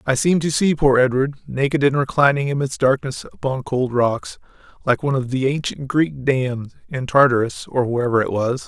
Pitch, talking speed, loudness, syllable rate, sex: 135 Hz, 185 wpm, -19 LUFS, 5.3 syllables/s, male